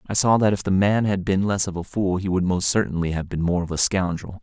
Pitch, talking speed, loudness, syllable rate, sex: 95 Hz, 300 wpm, -22 LUFS, 5.8 syllables/s, male